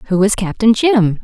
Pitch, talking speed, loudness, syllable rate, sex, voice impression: 210 Hz, 195 wpm, -14 LUFS, 4.2 syllables/s, female, very feminine, adult-like, slightly cute, slightly refreshing, friendly, slightly sweet